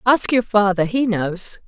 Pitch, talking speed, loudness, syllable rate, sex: 210 Hz, 180 wpm, -18 LUFS, 4.0 syllables/s, female